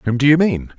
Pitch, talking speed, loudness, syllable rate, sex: 135 Hz, 305 wpm, -15 LUFS, 5.6 syllables/s, male